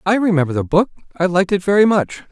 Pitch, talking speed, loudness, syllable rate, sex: 185 Hz, 235 wpm, -16 LUFS, 6.9 syllables/s, male